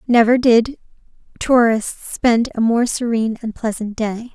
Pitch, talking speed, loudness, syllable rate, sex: 230 Hz, 140 wpm, -17 LUFS, 4.4 syllables/s, female